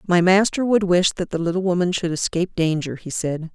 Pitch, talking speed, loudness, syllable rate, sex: 180 Hz, 220 wpm, -20 LUFS, 5.6 syllables/s, female